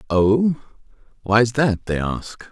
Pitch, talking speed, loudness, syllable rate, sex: 115 Hz, 120 wpm, -19 LUFS, 3.1 syllables/s, male